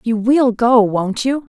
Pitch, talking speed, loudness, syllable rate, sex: 235 Hz, 195 wpm, -15 LUFS, 3.6 syllables/s, female